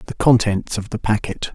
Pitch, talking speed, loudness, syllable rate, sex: 110 Hz, 195 wpm, -19 LUFS, 5.1 syllables/s, male